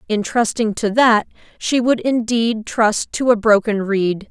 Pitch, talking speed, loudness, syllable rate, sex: 225 Hz, 165 wpm, -17 LUFS, 3.9 syllables/s, female